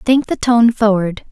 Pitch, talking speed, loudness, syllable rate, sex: 225 Hz, 185 wpm, -14 LUFS, 4.0 syllables/s, female